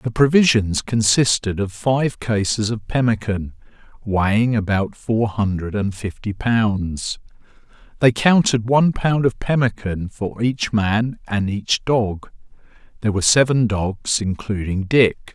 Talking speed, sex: 140 wpm, male